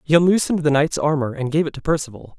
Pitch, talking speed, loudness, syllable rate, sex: 155 Hz, 250 wpm, -19 LUFS, 6.6 syllables/s, male